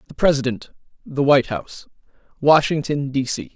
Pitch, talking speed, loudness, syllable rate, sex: 140 Hz, 135 wpm, -19 LUFS, 5.6 syllables/s, male